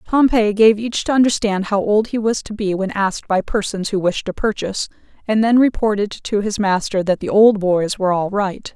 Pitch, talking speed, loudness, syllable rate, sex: 205 Hz, 220 wpm, -17 LUFS, 5.3 syllables/s, female